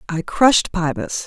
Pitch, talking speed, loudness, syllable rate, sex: 180 Hz, 140 wpm, -18 LUFS, 4.5 syllables/s, female